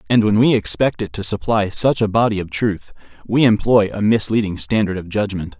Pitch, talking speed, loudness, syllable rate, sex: 110 Hz, 205 wpm, -17 LUFS, 5.4 syllables/s, male